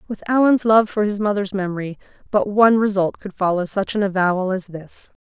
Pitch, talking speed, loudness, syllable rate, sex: 200 Hz, 195 wpm, -19 LUFS, 5.6 syllables/s, female